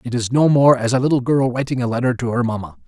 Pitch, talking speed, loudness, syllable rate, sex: 125 Hz, 295 wpm, -17 LUFS, 6.6 syllables/s, male